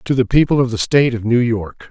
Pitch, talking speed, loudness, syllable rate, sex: 120 Hz, 285 wpm, -16 LUFS, 6.1 syllables/s, male